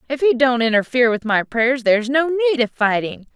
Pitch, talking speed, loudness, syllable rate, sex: 250 Hz, 215 wpm, -17 LUFS, 5.9 syllables/s, female